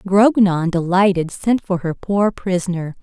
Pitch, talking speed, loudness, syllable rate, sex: 185 Hz, 140 wpm, -17 LUFS, 4.1 syllables/s, female